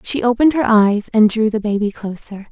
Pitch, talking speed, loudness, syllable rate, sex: 220 Hz, 215 wpm, -15 LUFS, 5.7 syllables/s, female